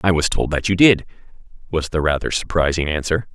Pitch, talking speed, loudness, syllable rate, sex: 85 Hz, 195 wpm, -19 LUFS, 5.8 syllables/s, male